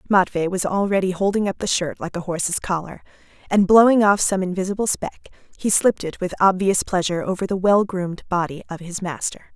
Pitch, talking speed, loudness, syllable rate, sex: 190 Hz, 195 wpm, -20 LUFS, 6.0 syllables/s, female